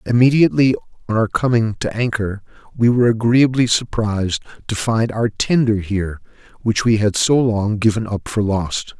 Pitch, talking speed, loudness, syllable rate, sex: 110 Hz, 160 wpm, -18 LUFS, 5.1 syllables/s, male